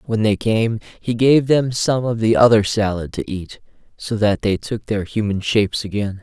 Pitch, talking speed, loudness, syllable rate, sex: 110 Hz, 200 wpm, -18 LUFS, 4.6 syllables/s, male